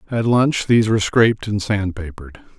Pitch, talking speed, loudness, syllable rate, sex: 105 Hz, 185 wpm, -17 LUFS, 5.8 syllables/s, male